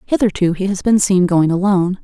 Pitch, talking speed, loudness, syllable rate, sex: 190 Hz, 205 wpm, -15 LUFS, 5.7 syllables/s, female